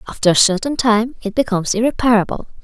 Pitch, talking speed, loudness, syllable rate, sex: 225 Hz, 160 wpm, -16 LUFS, 6.6 syllables/s, female